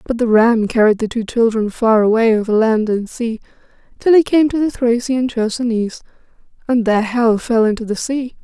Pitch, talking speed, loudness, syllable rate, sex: 230 Hz, 190 wpm, -16 LUFS, 5.4 syllables/s, female